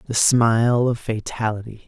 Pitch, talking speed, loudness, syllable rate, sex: 115 Hz, 130 wpm, -19 LUFS, 4.7 syllables/s, male